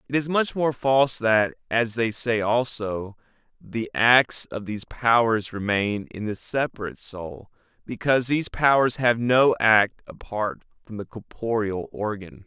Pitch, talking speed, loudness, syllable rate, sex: 115 Hz, 150 wpm, -23 LUFS, 4.3 syllables/s, male